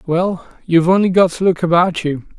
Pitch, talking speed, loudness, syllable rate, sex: 175 Hz, 200 wpm, -15 LUFS, 5.5 syllables/s, male